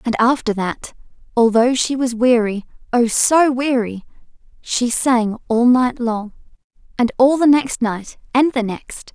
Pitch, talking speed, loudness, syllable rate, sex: 240 Hz, 150 wpm, -17 LUFS, 3.9 syllables/s, female